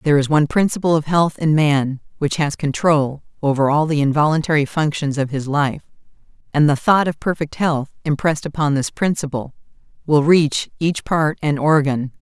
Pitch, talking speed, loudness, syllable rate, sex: 150 Hz, 170 wpm, -18 LUFS, 5.1 syllables/s, female